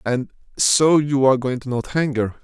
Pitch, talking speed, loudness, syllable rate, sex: 135 Hz, 170 wpm, -19 LUFS, 5.0 syllables/s, male